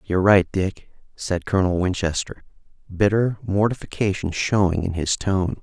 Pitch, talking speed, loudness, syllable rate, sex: 95 Hz, 130 wpm, -21 LUFS, 4.9 syllables/s, male